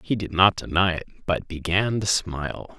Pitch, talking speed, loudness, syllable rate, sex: 95 Hz, 195 wpm, -23 LUFS, 4.9 syllables/s, male